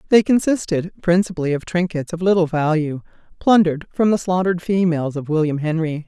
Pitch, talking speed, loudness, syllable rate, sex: 170 Hz, 160 wpm, -19 LUFS, 6.0 syllables/s, female